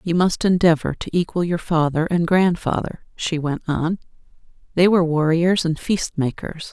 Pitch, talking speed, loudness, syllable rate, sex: 170 Hz, 160 wpm, -20 LUFS, 4.8 syllables/s, female